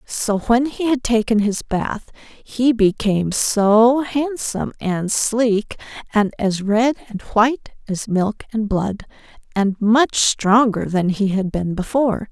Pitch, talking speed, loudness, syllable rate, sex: 220 Hz, 145 wpm, -18 LUFS, 3.6 syllables/s, female